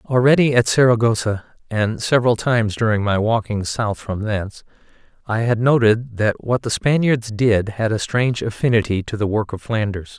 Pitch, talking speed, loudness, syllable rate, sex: 110 Hz, 170 wpm, -19 LUFS, 5.1 syllables/s, male